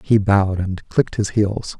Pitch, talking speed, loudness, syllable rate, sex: 100 Hz, 200 wpm, -19 LUFS, 4.7 syllables/s, male